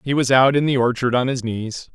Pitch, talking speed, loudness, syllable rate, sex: 125 Hz, 275 wpm, -18 LUFS, 5.5 syllables/s, male